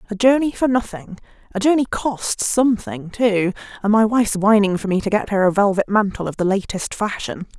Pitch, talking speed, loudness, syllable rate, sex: 210 Hz, 200 wpm, -19 LUFS, 5.4 syllables/s, female